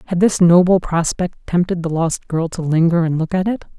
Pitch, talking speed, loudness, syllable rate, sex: 170 Hz, 220 wpm, -17 LUFS, 5.2 syllables/s, female